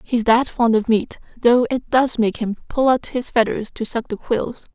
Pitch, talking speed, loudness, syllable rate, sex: 235 Hz, 225 wpm, -19 LUFS, 4.5 syllables/s, female